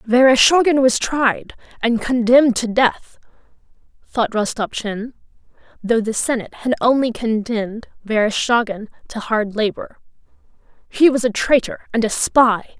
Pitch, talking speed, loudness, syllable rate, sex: 235 Hz, 120 wpm, -17 LUFS, 3.0 syllables/s, female